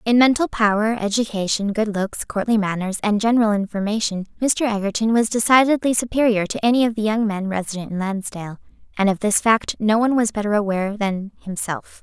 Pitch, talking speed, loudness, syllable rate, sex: 215 Hz, 180 wpm, -20 LUFS, 5.8 syllables/s, female